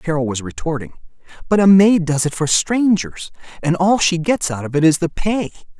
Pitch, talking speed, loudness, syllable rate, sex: 170 Hz, 205 wpm, -17 LUFS, 5.2 syllables/s, male